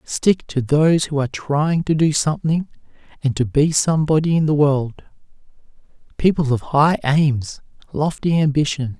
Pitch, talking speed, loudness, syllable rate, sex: 150 Hz, 140 wpm, -18 LUFS, 4.8 syllables/s, male